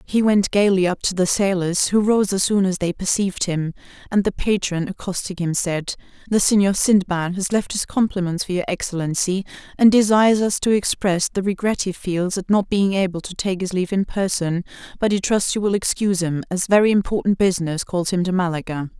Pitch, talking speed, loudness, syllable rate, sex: 190 Hz, 205 wpm, -20 LUFS, 5.5 syllables/s, female